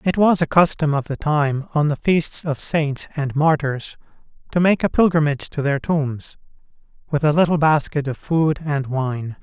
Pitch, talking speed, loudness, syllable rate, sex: 150 Hz, 185 wpm, -19 LUFS, 4.6 syllables/s, male